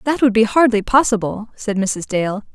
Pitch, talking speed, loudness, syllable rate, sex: 220 Hz, 190 wpm, -17 LUFS, 4.8 syllables/s, female